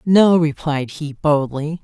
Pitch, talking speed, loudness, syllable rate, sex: 155 Hz, 130 wpm, -18 LUFS, 3.5 syllables/s, female